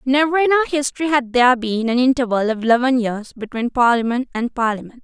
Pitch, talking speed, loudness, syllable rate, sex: 250 Hz, 190 wpm, -18 LUFS, 6.1 syllables/s, female